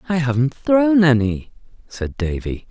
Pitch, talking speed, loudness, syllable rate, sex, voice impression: 130 Hz, 135 wpm, -18 LUFS, 4.2 syllables/s, male, masculine, adult-like, relaxed, slightly soft, slightly muffled, raspy, slightly intellectual, slightly friendly, wild, strict, slightly sharp